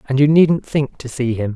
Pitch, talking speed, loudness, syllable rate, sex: 135 Hz, 270 wpm, -17 LUFS, 4.8 syllables/s, male